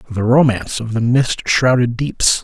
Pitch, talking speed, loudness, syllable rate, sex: 120 Hz, 175 wpm, -15 LUFS, 4.1 syllables/s, male